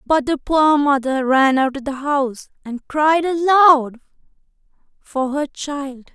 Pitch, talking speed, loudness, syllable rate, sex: 280 Hz, 145 wpm, -17 LUFS, 4.2 syllables/s, female